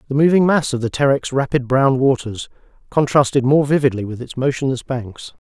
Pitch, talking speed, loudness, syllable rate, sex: 135 Hz, 175 wpm, -17 LUFS, 5.4 syllables/s, male